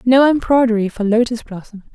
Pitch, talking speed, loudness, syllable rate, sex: 235 Hz, 155 wpm, -15 LUFS, 5.7 syllables/s, female